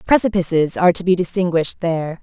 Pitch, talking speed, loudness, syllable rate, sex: 175 Hz, 160 wpm, -17 LUFS, 6.7 syllables/s, female